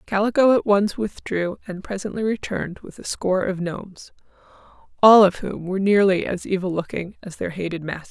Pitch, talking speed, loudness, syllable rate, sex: 195 Hz, 180 wpm, -21 LUFS, 5.6 syllables/s, female